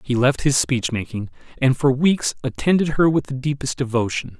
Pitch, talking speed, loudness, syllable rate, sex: 130 Hz, 190 wpm, -20 LUFS, 5.1 syllables/s, male